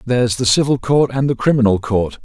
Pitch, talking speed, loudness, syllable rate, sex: 125 Hz, 240 wpm, -16 LUFS, 6.3 syllables/s, male